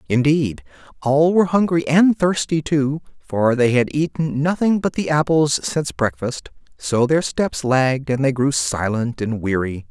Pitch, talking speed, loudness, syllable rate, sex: 140 Hz, 165 wpm, -19 LUFS, 4.4 syllables/s, male